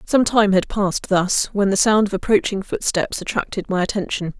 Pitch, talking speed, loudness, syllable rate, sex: 200 Hz, 190 wpm, -19 LUFS, 5.2 syllables/s, female